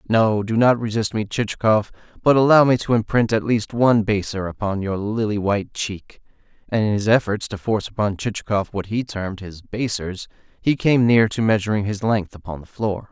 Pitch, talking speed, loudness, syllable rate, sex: 105 Hz, 195 wpm, -20 LUFS, 5.3 syllables/s, male